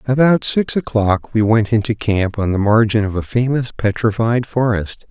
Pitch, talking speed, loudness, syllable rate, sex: 115 Hz, 175 wpm, -16 LUFS, 4.7 syllables/s, male